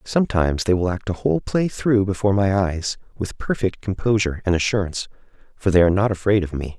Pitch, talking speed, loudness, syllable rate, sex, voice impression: 95 Hz, 205 wpm, -21 LUFS, 6.4 syllables/s, male, masculine, adult-like, slightly thick, cool, slightly intellectual, calm, slightly sweet